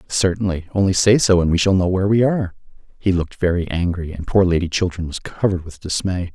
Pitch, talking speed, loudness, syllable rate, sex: 90 Hz, 210 wpm, -19 LUFS, 6.3 syllables/s, male